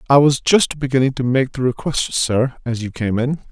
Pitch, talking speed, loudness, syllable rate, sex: 130 Hz, 220 wpm, -18 LUFS, 5.1 syllables/s, male